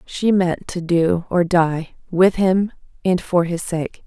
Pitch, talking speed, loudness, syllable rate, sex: 175 Hz, 175 wpm, -19 LUFS, 3.5 syllables/s, female